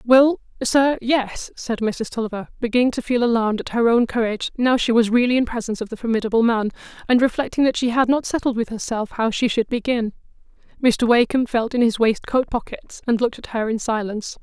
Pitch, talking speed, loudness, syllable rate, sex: 235 Hz, 210 wpm, -20 LUFS, 6.0 syllables/s, female